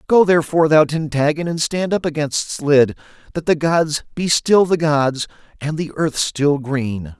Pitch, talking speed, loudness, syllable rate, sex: 150 Hz, 175 wpm, -17 LUFS, 4.4 syllables/s, male